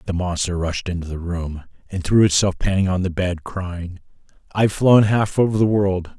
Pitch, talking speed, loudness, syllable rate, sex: 95 Hz, 195 wpm, -20 LUFS, 5.0 syllables/s, male